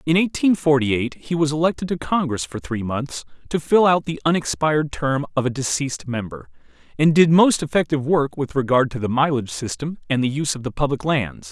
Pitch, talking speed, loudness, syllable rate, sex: 145 Hz, 210 wpm, -20 LUFS, 5.8 syllables/s, male